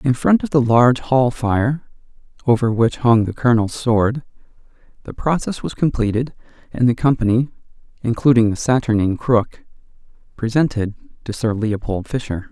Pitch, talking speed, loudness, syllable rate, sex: 120 Hz, 140 wpm, -18 LUFS, 5.0 syllables/s, male